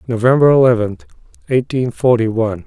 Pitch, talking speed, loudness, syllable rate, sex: 120 Hz, 110 wpm, -14 LUFS, 5.7 syllables/s, male